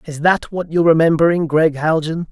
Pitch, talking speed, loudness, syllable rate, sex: 160 Hz, 180 wpm, -16 LUFS, 5.5 syllables/s, male